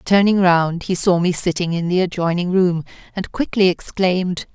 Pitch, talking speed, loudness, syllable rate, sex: 180 Hz, 170 wpm, -18 LUFS, 4.9 syllables/s, female